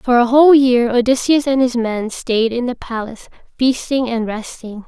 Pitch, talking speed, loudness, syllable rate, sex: 245 Hz, 185 wpm, -15 LUFS, 4.9 syllables/s, female